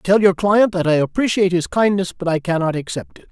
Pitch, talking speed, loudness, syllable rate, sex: 180 Hz, 235 wpm, -17 LUFS, 6.2 syllables/s, male